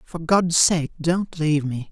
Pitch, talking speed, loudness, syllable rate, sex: 160 Hz, 190 wpm, -20 LUFS, 4.0 syllables/s, male